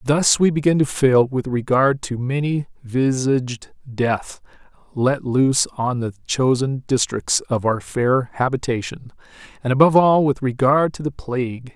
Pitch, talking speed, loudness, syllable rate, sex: 130 Hz, 150 wpm, -19 LUFS, 4.3 syllables/s, male